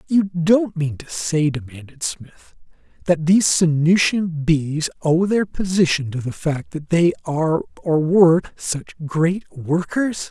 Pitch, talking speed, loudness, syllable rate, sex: 160 Hz, 145 wpm, -19 LUFS, 4.0 syllables/s, male